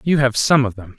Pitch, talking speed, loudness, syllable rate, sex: 125 Hz, 305 wpm, -17 LUFS, 5.6 syllables/s, male